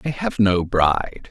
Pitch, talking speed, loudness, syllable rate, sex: 110 Hz, 185 wpm, -19 LUFS, 4.2 syllables/s, male